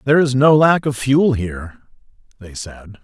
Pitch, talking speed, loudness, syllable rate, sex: 125 Hz, 180 wpm, -15 LUFS, 5.0 syllables/s, male